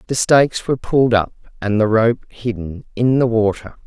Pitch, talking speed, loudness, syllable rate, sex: 115 Hz, 185 wpm, -17 LUFS, 5.1 syllables/s, female